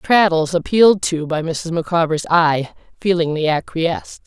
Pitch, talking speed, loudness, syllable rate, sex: 170 Hz, 125 wpm, -17 LUFS, 4.6 syllables/s, female